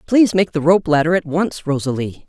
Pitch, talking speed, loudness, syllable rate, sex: 165 Hz, 210 wpm, -17 LUFS, 5.6 syllables/s, female